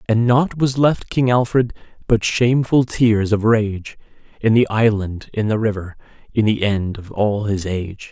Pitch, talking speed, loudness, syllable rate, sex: 110 Hz, 175 wpm, -18 LUFS, 4.4 syllables/s, male